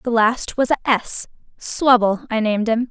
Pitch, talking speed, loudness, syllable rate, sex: 230 Hz, 165 wpm, -19 LUFS, 4.8 syllables/s, female